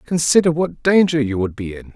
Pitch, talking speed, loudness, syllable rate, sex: 140 Hz, 215 wpm, -17 LUFS, 5.4 syllables/s, male